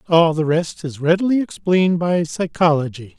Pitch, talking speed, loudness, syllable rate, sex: 165 Hz, 150 wpm, -18 LUFS, 4.9 syllables/s, male